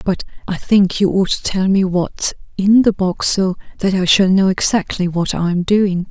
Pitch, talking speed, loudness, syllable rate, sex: 190 Hz, 215 wpm, -16 LUFS, 4.5 syllables/s, female